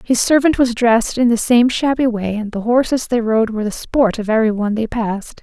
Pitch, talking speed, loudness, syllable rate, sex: 230 Hz, 230 wpm, -16 LUFS, 5.6 syllables/s, female